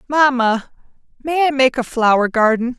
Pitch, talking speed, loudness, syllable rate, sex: 255 Hz, 150 wpm, -16 LUFS, 4.7 syllables/s, female